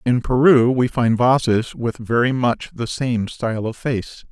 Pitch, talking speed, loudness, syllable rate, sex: 120 Hz, 180 wpm, -19 LUFS, 4.1 syllables/s, male